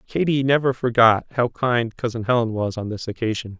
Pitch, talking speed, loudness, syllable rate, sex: 120 Hz, 185 wpm, -21 LUFS, 5.4 syllables/s, male